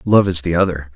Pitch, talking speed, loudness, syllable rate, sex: 85 Hz, 250 wpm, -15 LUFS, 6.0 syllables/s, male